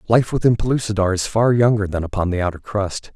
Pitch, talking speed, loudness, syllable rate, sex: 105 Hz, 210 wpm, -19 LUFS, 6.0 syllables/s, male